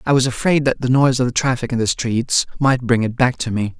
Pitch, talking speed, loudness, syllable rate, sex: 125 Hz, 285 wpm, -18 LUFS, 5.9 syllables/s, male